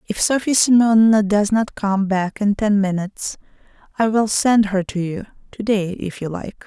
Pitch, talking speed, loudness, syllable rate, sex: 205 Hz, 190 wpm, -18 LUFS, 4.8 syllables/s, female